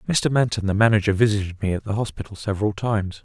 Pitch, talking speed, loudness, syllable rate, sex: 105 Hz, 205 wpm, -22 LUFS, 6.9 syllables/s, male